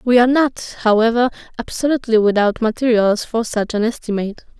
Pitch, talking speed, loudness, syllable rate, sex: 230 Hz, 145 wpm, -17 LUFS, 6.0 syllables/s, female